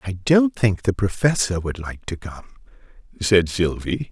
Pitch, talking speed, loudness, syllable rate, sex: 105 Hz, 160 wpm, -21 LUFS, 4.4 syllables/s, male